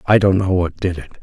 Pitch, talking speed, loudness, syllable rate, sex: 90 Hz, 295 wpm, -17 LUFS, 5.5 syllables/s, male